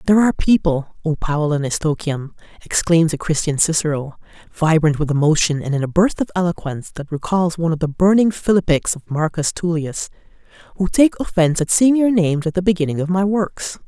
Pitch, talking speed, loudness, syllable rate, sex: 165 Hz, 185 wpm, -18 LUFS, 5.9 syllables/s, female